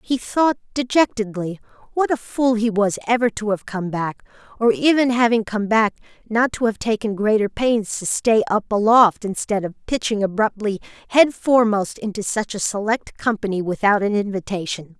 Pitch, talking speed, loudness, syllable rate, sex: 215 Hz, 170 wpm, -20 LUFS, 4.9 syllables/s, female